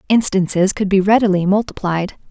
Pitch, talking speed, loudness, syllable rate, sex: 195 Hz, 130 wpm, -16 LUFS, 5.4 syllables/s, female